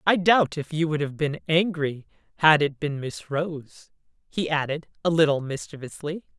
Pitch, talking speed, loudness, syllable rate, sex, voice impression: 155 Hz, 170 wpm, -24 LUFS, 4.6 syllables/s, female, feminine, adult-like, tensed, powerful, bright, fluent, intellectual, friendly, unique, lively, kind, slightly intense, light